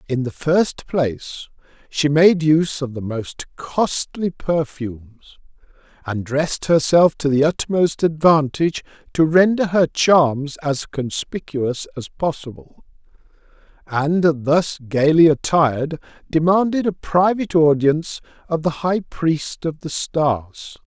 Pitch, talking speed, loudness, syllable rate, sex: 155 Hz, 120 wpm, -18 LUFS, 3.8 syllables/s, male